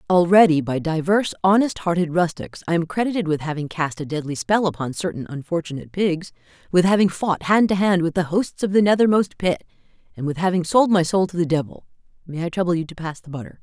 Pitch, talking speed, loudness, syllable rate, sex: 175 Hz, 210 wpm, -20 LUFS, 6.0 syllables/s, female